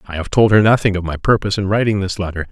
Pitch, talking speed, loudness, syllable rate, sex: 100 Hz, 285 wpm, -16 LUFS, 7.2 syllables/s, male